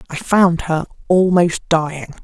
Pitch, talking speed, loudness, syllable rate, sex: 170 Hz, 135 wpm, -16 LUFS, 4.2 syllables/s, female